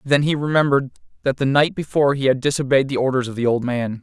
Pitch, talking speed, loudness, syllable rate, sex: 135 Hz, 240 wpm, -19 LUFS, 6.7 syllables/s, male